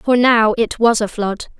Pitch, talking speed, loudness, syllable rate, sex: 225 Hz, 225 wpm, -15 LUFS, 4.2 syllables/s, female